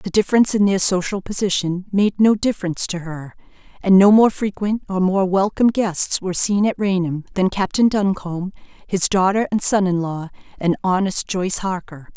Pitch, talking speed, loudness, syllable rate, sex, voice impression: 190 Hz, 180 wpm, -18 LUFS, 5.4 syllables/s, female, very feminine, adult-like, thin, slightly tensed, slightly weak, slightly dark, slightly hard, clear, fluent, slightly cute, cool, intellectual, very refreshing, sincere, slightly calm, friendly, reassuring, slightly unique, elegant, slightly wild, slightly sweet, lively, strict, slightly intense, slightly sharp, light